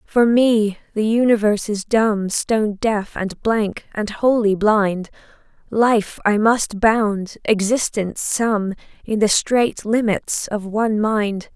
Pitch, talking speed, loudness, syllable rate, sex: 215 Hz, 135 wpm, -19 LUFS, 3.5 syllables/s, female